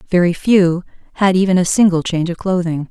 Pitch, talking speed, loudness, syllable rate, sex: 180 Hz, 185 wpm, -15 LUFS, 5.9 syllables/s, female